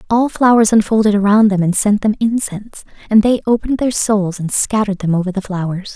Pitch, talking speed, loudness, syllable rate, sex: 210 Hz, 200 wpm, -15 LUFS, 6.0 syllables/s, female